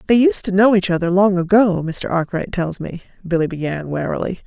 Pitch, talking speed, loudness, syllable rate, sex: 185 Hz, 200 wpm, -18 LUFS, 5.4 syllables/s, female